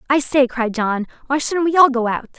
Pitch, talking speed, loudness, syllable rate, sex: 260 Hz, 250 wpm, -17 LUFS, 5.4 syllables/s, female